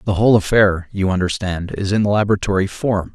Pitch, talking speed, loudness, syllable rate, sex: 100 Hz, 170 wpm, -17 LUFS, 5.8 syllables/s, male